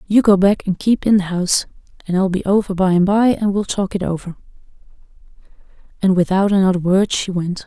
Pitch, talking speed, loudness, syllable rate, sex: 190 Hz, 205 wpm, -17 LUFS, 5.8 syllables/s, female